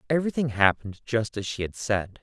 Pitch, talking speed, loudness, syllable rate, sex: 115 Hz, 190 wpm, -26 LUFS, 6.0 syllables/s, male